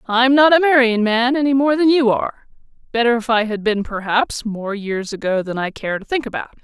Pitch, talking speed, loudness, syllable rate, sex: 235 Hz, 225 wpm, -17 LUFS, 5.4 syllables/s, female